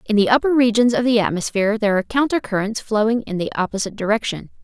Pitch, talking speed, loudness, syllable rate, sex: 220 Hz, 205 wpm, -19 LUFS, 7.1 syllables/s, female